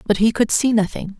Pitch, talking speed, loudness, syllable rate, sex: 215 Hz, 250 wpm, -18 LUFS, 5.8 syllables/s, female